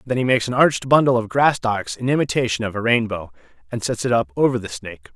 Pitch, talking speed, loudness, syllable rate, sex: 115 Hz, 245 wpm, -19 LUFS, 6.6 syllables/s, male